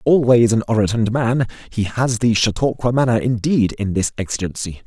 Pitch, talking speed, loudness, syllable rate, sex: 115 Hz, 160 wpm, -18 LUFS, 5.3 syllables/s, male